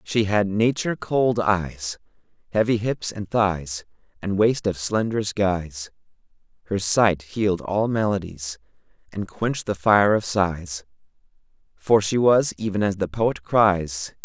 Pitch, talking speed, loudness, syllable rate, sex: 100 Hz, 140 wpm, -22 LUFS, 4.0 syllables/s, male